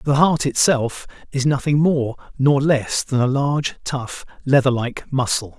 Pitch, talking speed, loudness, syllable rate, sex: 135 Hz, 160 wpm, -19 LUFS, 4.3 syllables/s, male